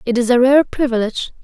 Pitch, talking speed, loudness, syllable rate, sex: 250 Hz, 210 wpm, -15 LUFS, 6.5 syllables/s, female